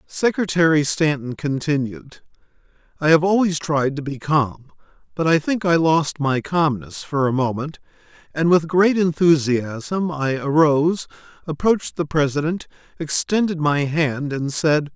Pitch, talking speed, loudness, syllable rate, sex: 155 Hz, 135 wpm, -20 LUFS, 4.3 syllables/s, male